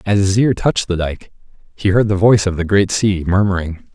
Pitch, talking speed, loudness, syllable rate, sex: 100 Hz, 230 wpm, -16 LUFS, 5.7 syllables/s, male